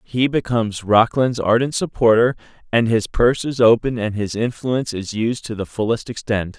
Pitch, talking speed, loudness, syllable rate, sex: 115 Hz, 175 wpm, -19 LUFS, 5.1 syllables/s, male